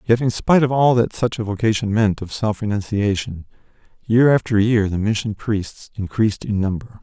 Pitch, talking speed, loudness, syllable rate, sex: 110 Hz, 190 wpm, -19 LUFS, 5.2 syllables/s, male